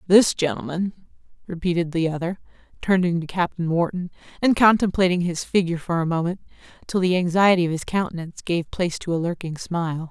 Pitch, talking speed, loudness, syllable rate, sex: 175 Hz, 165 wpm, -22 LUFS, 6.3 syllables/s, female